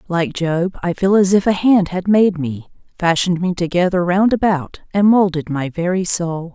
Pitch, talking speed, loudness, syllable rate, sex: 180 Hz, 190 wpm, -16 LUFS, 4.8 syllables/s, female